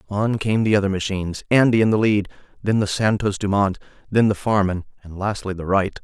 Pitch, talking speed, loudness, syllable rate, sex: 100 Hz, 200 wpm, -20 LUFS, 5.7 syllables/s, male